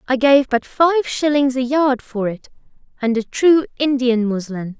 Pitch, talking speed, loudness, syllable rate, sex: 260 Hz, 175 wpm, -17 LUFS, 4.2 syllables/s, female